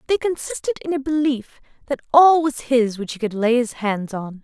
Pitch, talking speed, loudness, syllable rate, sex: 265 Hz, 215 wpm, -20 LUFS, 5.1 syllables/s, female